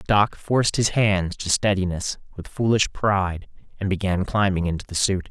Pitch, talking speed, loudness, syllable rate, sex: 100 Hz, 170 wpm, -22 LUFS, 4.9 syllables/s, male